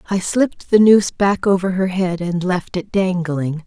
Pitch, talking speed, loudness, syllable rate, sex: 185 Hz, 195 wpm, -17 LUFS, 4.6 syllables/s, female